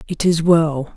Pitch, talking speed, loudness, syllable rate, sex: 160 Hz, 190 wpm, -16 LUFS, 3.8 syllables/s, female